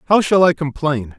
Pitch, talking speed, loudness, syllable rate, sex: 155 Hz, 200 wpm, -16 LUFS, 5.1 syllables/s, male